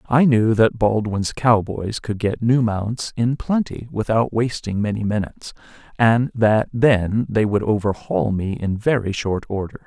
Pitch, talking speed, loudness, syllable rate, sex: 110 Hz, 160 wpm, -20 LUFS, 4.2 syllables/s, male